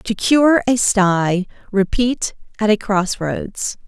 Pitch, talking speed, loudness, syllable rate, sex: 210 Hz, 140 wpm, -17 LUFS, 3.1 syllables/s, female